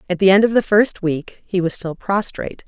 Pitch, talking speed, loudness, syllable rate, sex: 190 Hz, 245 wpm, -18 LUFS, 5.3 syllables/s, female